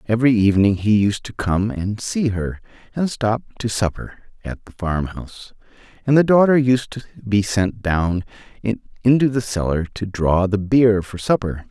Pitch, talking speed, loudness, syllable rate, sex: 110 Hz, 170 wpm, -19 LUFS, 4.6 syllables/s, male